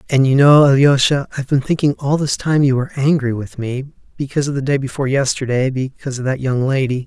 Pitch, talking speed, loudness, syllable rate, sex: 135 Hz, 220 wpm, -16 LUFS, 6.4 syllables/s, male